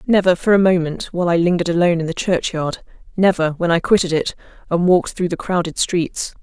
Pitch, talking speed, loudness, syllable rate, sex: 175 Hz, 205 wpm, -18 LUFS, 6.2 syllables/s, female